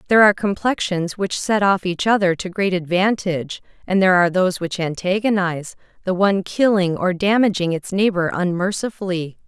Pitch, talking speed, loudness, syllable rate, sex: 185 Hz, 160 wpm, -19 LUFS, 5.7 syllables/s, female